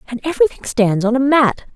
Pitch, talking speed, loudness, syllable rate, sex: 245 Hz, 205 wpm, -16 LUFS, 6.4 syllables/s, female